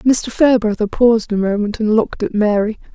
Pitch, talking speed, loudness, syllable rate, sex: 220 Hz, 185 wpm, -16 LUFS, 5.8 syllables/s, female